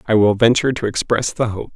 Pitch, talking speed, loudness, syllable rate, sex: 115 Hz, 240 wpm, -17 LUFS, 6.1 syllables/s, male